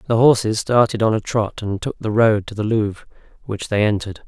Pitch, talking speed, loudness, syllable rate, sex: 110 Hz, 225 wpm, -19 LUFS, 5.8 syllables/s, male